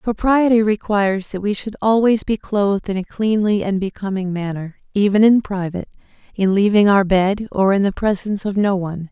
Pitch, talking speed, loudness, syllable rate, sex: 200 Hz, 185 wpm, -18 LUFS, 5.4 syllables/s, female